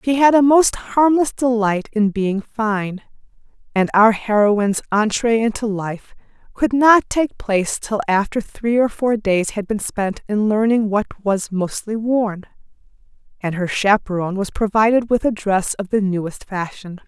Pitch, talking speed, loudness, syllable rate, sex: 215 Hz, 160 wpm, -18 LUFS, 4.3 syllables/s, female